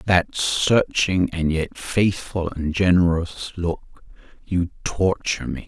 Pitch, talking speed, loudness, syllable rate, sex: 85 Hz, 125 wpm, -21 LUFS, 3.5 syllables/s, male